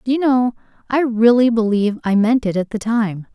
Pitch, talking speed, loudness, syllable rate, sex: 230 Hz, 215 wpm, -17 LUFS, 5.4 syllables/s, female